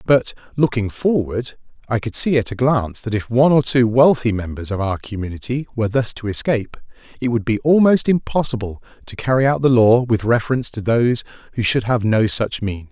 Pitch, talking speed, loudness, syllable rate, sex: 120 Hz, 200 wpm, -18 LUFS, 5.7 syllables/s, male